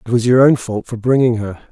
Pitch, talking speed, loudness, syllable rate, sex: 120 Hz, 280 wpm, -15 LUFS, 6.0 syllables/s, male